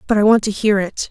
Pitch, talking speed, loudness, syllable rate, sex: 210 Hz, 325 wpm, -16 LUFS, 6.3 syllables/s, female